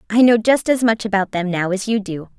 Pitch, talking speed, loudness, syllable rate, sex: 210 Hz, 275 wpm, -17 LUFS, 5.8 syllables/s, female